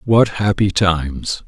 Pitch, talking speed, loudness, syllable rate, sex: 95 Hz, 120 wpm, -17 LUFS, 3.7 syllables/s, male